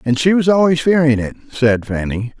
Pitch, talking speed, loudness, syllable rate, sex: 140 Hz, 200 wpm, -15 LUFS, 5.2 syllables/s, male